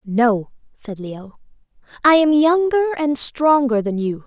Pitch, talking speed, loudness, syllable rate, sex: 260 Hz, 140 wpm, -17 LUFS, 3.9 syllables/s, female